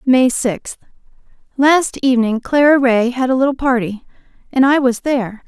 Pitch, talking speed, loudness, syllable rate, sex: 255 Hz, 140 wpm, -15 LUFS, 4.8 syllables/s, female